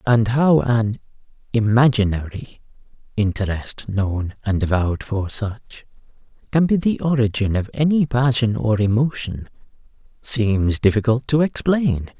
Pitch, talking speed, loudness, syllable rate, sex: 115 Hz, 115 wpm, -19 LUFS, 4.2 syllables/s, male